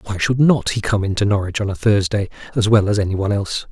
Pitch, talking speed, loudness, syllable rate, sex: 105 Hz, 260 wpm, -18 LUFS, 6.7 syllables/s, male